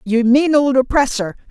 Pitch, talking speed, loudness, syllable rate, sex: 260 Hz, 160 wpm, -15 LUFS, 5.5 syllables/s, female